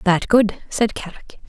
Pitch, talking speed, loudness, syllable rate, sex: 205 Hz, 160 wpm, -19 LUFS, 5.0 syllables/s, female